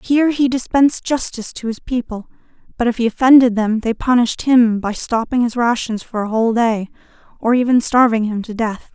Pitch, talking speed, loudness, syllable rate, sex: 235 Hz, 195 wpm, -16 LUFS, 5.6 syllables/s, female